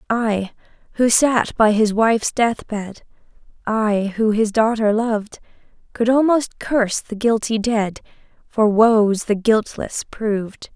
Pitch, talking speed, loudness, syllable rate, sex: 220 Hz, 135 wpm, -18 LUFS, 3.8 syllables/s, female